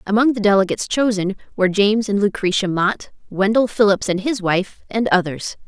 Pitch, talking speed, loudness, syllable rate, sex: 205 Hz, 170 wpm, -18 LUFS, 5.6 syllables/s, female